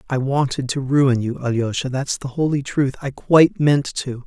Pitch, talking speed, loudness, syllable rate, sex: 135 Hz, 195 wpm, -19 LUFS, 4.7 syllables/s, male